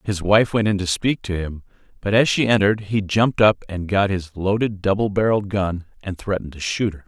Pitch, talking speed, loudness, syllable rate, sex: 100 Hz, 230 wpm, -20 LUFS, 5.6 syllables/s, male